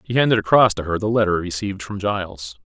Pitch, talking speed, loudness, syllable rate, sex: 100 Hz, 225 wpm, -19 LUFS, 6.6 syllables/s, male